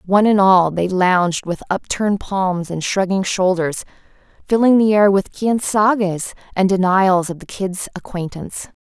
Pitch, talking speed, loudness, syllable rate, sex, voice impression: 190 Hz, 155 wpm, -17 LUFS, 4.6 syllables/s, female, feminine, adult-like, slightly relaxed, powerful, slightly dark, slightly muffled, raspy, slightly intellectual, calm, slightly strict, slightly sharp